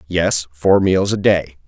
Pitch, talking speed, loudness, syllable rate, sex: 90 Hz, 180 wpm, -16 LUFS, 3.9 syllables/s, male